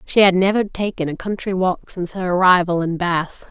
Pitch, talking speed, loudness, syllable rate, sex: 185 Hz, 205 wpm, -18 LUFS, 5.3 syllables/s, female